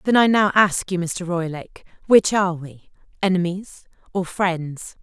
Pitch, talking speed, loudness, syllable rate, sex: 180 Hz, 145 wpm, -20 LUFS, 4.4 syllables/s, female